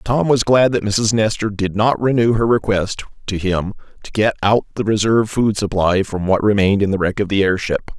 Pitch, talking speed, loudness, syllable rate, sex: 105 Hz, 220 wpm, -17 LUFS, 5.4 syllables/s, male